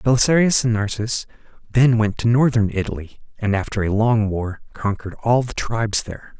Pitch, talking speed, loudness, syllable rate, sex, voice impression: 110 Hz, 170 wpm, -20 LUFS, 5.4 syllables/s, male, very masculine, very adult-like, slightly middle-aged, thick, slightly relaxed, slightly weak, bright, very soft, very clear, fluent, slightly raspy, cool, very intellectual, very refreshing, sincere, calm, slightly mature, very friendly, very reassuring, very unique, elegant, very wild, very sweet, very lively, very kind, slightly intense, slightly modest, slightly light